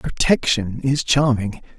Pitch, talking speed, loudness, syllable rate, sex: 125 Hz, 100 wpm, -19 LUFS, 3.8 syllables/s, male